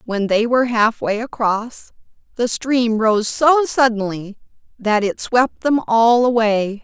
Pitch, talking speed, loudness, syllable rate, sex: 230 Hz, 140 wpm, -17 LUFS, 3.8 syllables/s, female